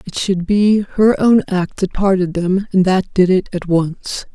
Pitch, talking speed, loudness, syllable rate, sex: 190 Hz, 205 wpm, -16 LUFS, 4.0 syllables/s, female